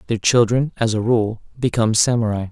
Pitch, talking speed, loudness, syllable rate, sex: 115 Hz, 165 wpm, -18 LUFS, 5.6 syllables/s, male